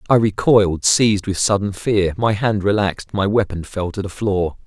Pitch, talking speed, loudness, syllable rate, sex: 100 Hz, 195 wpm, -18 LUFS, 5.0 syllables/s, male